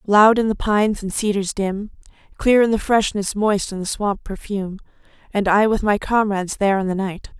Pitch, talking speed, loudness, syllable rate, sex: 205 Hz, 205 wpm, -19 LUFS, 5.3 syllables/s, female